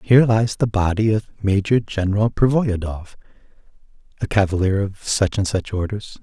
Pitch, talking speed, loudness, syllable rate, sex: 105 Hz, 155 wpm, -20 LUFS, 5.3 syllables/s, male